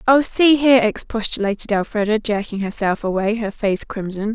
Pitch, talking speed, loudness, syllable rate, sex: 220 Hz, 150 wpm, -19 LUFS, 5.3 syllables/s, female